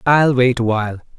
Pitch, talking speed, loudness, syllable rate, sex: 125 Hz, 150 wpm, -16 LUFS, 5.4 syllables/s, male